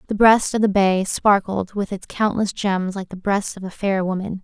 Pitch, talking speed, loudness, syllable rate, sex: 195 Hz, 230 wpm, -20 LUFS, 4.7 syllables/s, female